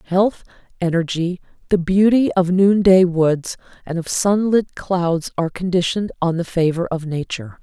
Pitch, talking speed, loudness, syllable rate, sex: 180 Hz, 140 wpm, -18 LUFS, 4.8 syllables/s, female